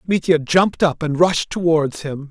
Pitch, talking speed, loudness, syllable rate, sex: 160 Hz, 180 wpm, -18 LUFS, 4.6 syllables/s, male